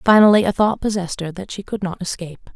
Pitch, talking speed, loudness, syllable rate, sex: 190 Hz, 235 wpm, -19 LUFS, 6.5 syllables/s, female